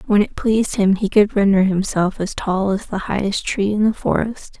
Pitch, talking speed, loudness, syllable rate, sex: 200 Hz, 220 wpm, -18 LUFS, 5.0 syllables/s, female